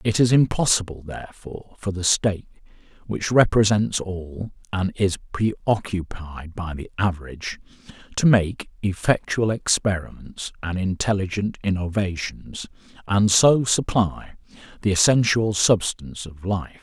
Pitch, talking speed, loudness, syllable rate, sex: 100 Hz, 110 wpm, -22 LUFS, 4.4 syllables/s, male